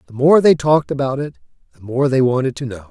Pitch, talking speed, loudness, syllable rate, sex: 130 Hz, 250 wpm, -16 LUFS, 6.4 syllables/s, male